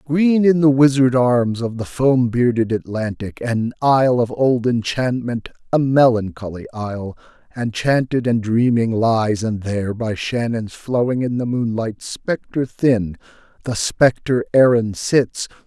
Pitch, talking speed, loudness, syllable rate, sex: 120 Hz, 140 wpm, -18 LUFS, 4.0 syllables/s, male